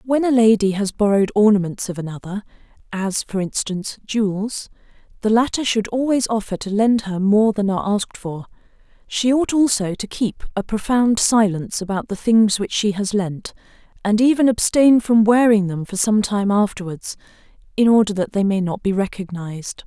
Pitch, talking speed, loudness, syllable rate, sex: 210 Hz, 175 wpm, -19 LUFS, 5.2 syllables/s, female